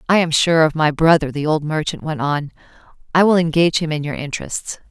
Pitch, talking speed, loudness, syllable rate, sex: 155 Hz, 220 wpm, -17 LUFS, 6.0 syllables/s, female